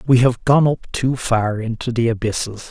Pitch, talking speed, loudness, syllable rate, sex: 120 Hz, 200 wpm, -18 LUFS, 4.7 syllables/s, male